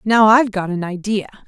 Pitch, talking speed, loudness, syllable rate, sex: 205 Hz, 205 wpm, -17 LUFS, 5.8 syllables/s, female